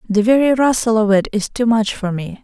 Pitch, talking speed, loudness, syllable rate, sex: 220 Hz, 245 wpm, -16 LUFS, 5.5 syllables/s, female